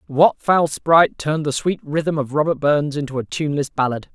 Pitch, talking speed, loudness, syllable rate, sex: 150 Hz, 205 wpm, -19 LUFS, 5.3 syllables/s, male